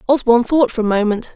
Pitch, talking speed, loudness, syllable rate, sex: 240 Hz, 220 wpm, -15 LUFS, 6.7 syllables/s, female